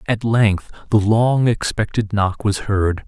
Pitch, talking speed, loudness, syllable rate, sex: 105 Hz, 155 wpm, -18 LUFS, 3.7 syllables/s, male